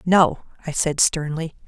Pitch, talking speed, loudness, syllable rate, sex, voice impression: 160 Hz, 145 wpm, -21 LUFS, 3.9 syllables/s, female, very feminine, very adult-like, slightly thin, tensed, slightly powerful, bright, soft, clear, fluent, slightly raspy, cool, intellectual, very refreshing, sincere, calm, friendly, very reassuring, unique, elegant, slightly wild, sweet, lively, kind, slightly intense